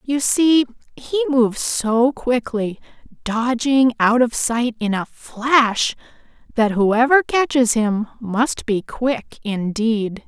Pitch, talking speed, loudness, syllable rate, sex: 240 Hz, 125 wpm, -18 LUFS, 3.3 syllables/s, female